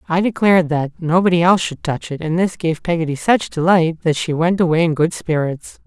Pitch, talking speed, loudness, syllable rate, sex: 170 Hz, 215 wpm, -17 LUFS, 5.5 syllables/s, male